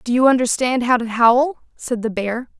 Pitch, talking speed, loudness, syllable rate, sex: 245 Hz, 210 wpm, -18 LUFS, 4.9 syllables/s, female